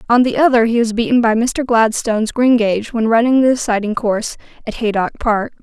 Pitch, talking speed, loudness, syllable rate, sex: 230 Hz, 190 wpm, -15 LUFS, 5.8 syllables/s, female